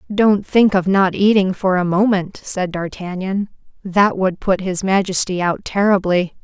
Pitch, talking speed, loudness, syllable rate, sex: 190 Hz, 160 wpm, -17 LUFS, 4.3 syllables/s, female